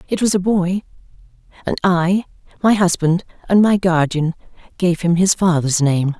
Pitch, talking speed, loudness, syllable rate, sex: 180 Hz, 155 wpm, -17 LUFS, 4.6 syllables/s, female